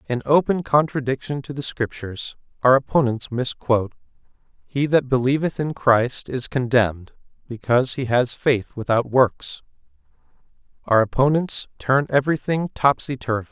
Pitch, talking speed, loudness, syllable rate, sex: 130 Hz, 125 wpm, -21 LUFS, 4.9 syllables/s, male